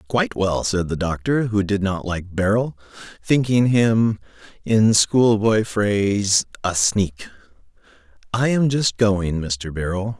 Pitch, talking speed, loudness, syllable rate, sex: 105 Hz, 135 wpm, -20 LUFS, 3.9 syllables/s, male